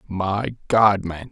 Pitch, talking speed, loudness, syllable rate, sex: 100 Hz, 135 wpm, -20 LUFS, 3.3 syllables/s, male